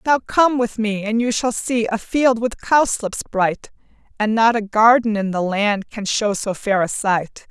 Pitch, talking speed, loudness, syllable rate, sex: 220 Hz, 210 wpm, -18 LUFS, 4.1 syllables/s, female